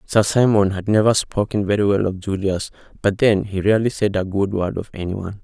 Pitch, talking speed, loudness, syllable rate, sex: 100 Hz, 210 wpm, -19 LUFS, 5.6 syllables/s, male